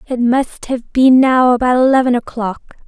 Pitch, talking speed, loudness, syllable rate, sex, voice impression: 250 Hz, 165 wpm, -13 LUFS, 4.8 syllables/s, female, feminine, slightly young, slightly soft, cute, slightly refreshing, friendly, kind